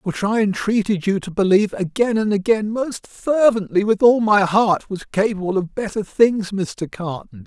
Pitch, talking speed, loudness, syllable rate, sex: 205 Hz, 175 wpm, -19 LUFS, 4.7 syllables/s, male